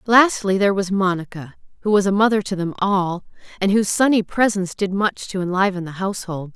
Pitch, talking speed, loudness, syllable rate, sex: 195 Hz, 190 wpm, -19 LUFS, 5.9 syllables/s, female